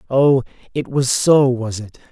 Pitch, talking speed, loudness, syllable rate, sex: 130 Hz, 170 wpm, -17 LUFS, 4.1 syllables/s, male